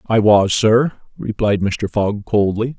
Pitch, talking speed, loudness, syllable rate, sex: 110 Hz, 150 wpm, -16 LUFS, 3.7 syllables/s, male